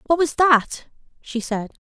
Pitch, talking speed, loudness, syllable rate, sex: 275 Hz, 160 wpm, -20 LUFS, 3.8 syllables/s, female